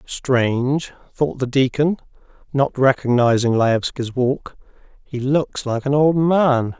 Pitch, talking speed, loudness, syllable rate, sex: 135 Hz, 125 wpm, -19 LUFS, 3.6 syllables/s, male